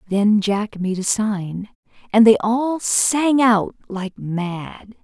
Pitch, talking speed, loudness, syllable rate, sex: 210 Hz, 145 wpm, -19 LUFS, 2.9 syllables/s, female